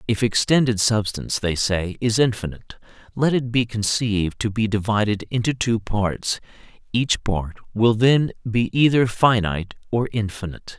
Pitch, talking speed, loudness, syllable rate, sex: 110 Hz, 145 wpm, -21 LUFS, 4.9 syllables/s, male